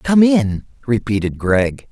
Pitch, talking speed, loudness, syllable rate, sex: 120 Hz, 125 wpm, -17 LUFS, 3.6 syllables/s, male